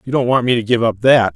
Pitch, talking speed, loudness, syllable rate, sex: 120 Hz, 355 wpm, -15 LUFS, 6.4 syllables/s, male